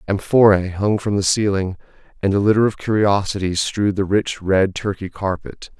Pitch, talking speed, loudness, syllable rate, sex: 100 Hz, 165 wpm, -18 LUFS, 5.1 syllables/s, male